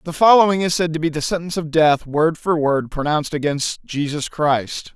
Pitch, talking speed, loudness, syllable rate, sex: 155 Hz, 205 wpm, -18 LUFS, 5.2 syllables/s, male